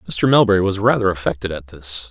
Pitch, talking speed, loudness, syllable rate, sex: 95 Hz, 200 wpm, -18 LUFS, 6.1 syllables/s, male